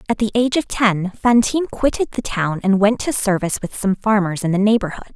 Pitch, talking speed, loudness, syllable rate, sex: 210 Hz, 220 wpm, -18 LUFS, 5.9 syllables/s, female